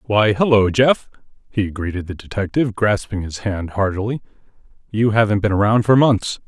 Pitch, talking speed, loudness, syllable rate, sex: 105 Hz, 160 wpm, -18 LUFS, 5.2 syllables/s, male